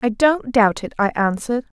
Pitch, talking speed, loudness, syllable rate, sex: 230 Hz, 200 wpm, -19 LUFS, 5.4 syllables/s, female